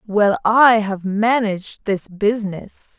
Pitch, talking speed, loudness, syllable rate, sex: 210 Hz, 120 wpm, -17 LUFS, 3.8 syllables/s, female